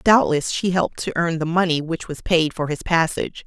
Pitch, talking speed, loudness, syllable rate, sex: 165 Hz, 225 wpm, -21 LUFS, 5.4 syllables/s, female